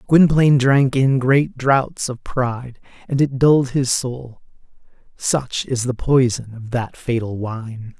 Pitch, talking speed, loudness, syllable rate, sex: 130 Hz, 150 wpm, -18 LUFS, 3.9 syllables/s, male